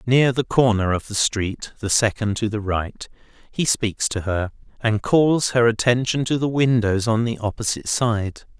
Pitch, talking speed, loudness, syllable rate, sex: 115 Hz, 180 wpm, -21 LUFS, 4.5 syllables/s, male